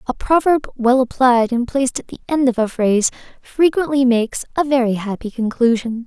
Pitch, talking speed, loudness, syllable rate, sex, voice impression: 250 Hz, 180 wpm, -17 LUFS, 5.4 syllables/s, female, very feminine, young, very thin, tensed, very bright, soft, very clear, very fluent, slightly raspy, very cute, intellectual, very refreshing, sincere, calm, very friendly, very reassuring, very unique, very elegant, slightly wild, very sweet, very lively, very kind, slightly intense, sharp, very light